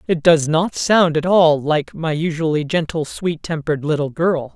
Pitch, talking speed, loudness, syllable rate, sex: 160 Hz, 185 wpm, -18 LUFS, 4.6 syllables/s, female